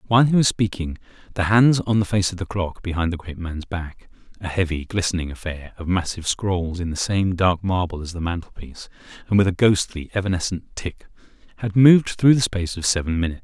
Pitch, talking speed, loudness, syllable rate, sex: 95 Hz, 195 wpm, -21 LUFS, 5.9 syllables/s, male